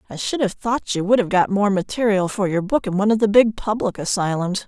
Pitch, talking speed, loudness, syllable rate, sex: 200 Hz, 255 wpm, -20 LUFS, 5.8 syllables/s, female